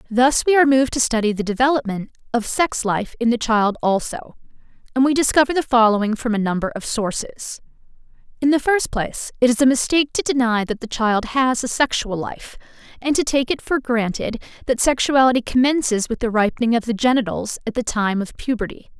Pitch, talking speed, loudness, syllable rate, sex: 240 Hz, 195 wpm, -19 LUFS, 5.8 syllables/s, female